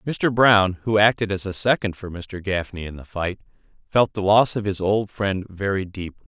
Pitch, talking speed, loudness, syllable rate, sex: 100 Hz, 205 wpm, -21 LUFS, 4.7 syllables/s, male